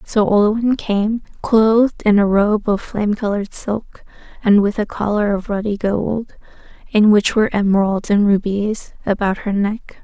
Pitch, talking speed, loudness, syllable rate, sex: 210 Hz, 160 wpm, -17 LUFS, 4.5 syllables/s, female